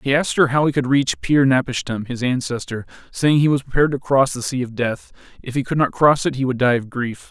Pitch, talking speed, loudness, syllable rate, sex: 130 Hz, 280 wpm, -19 LUFS, 6.1 syllables/s, male